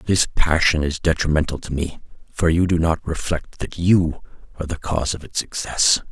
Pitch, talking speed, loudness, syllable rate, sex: 80 Hz, 185 wpm, -21 LUFS, 5.1 syllables/s, male